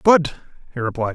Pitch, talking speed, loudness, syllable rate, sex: 140 Hz, 155 wpm, -21 LUFS, 6.4 syllables/s, male